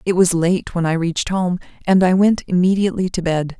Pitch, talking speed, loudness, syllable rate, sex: 180 Hz, 215 wpm, -17 LUFS, 5.7 syllables/s, female